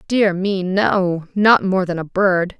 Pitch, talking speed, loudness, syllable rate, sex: 190 Hz, 185 wpm, -17 LUFS, 3.4 syllables/s, female